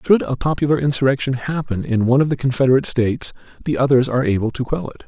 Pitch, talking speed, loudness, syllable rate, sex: 135 Hz, 215 wpm, -18 LUFS, 7.2 syllables/s, male